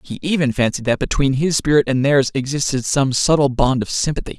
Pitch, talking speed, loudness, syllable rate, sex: 135 Hz, 205 wpm, -18 LUFS, 5.7 syllables/s, male